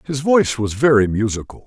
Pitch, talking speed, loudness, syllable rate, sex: 125 Hz, 180 wpm, -17 LUFS, 5.7 syllables/s, male